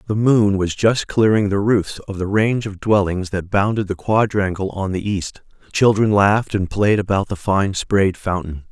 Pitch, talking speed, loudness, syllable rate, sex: 100 Hz, 195 wpm, -18 LUFS, 4.7 syllables/s, male